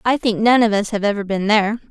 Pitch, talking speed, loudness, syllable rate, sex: 215 Hz, 285 wpm, -17 LUFS, 6.5 syllables/s, female